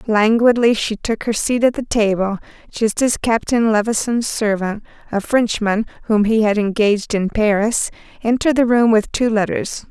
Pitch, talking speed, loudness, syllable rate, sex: 220 Hz, 165 wpm, -17 LUFS, 4.8 syllables/s, female